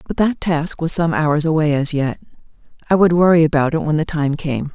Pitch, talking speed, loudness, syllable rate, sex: 160 Hz, 230 wpm, -17 LUFS, 5.4 syllables/s, female